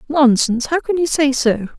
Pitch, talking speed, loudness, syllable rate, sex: 275 Hz, 200 wpm, -16 LUFS, 5.2 syllables/s, female